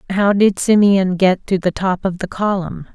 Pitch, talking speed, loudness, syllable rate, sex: 190 Hz, 205 wpm, -16 LUFS, 4.5 syllables/s, female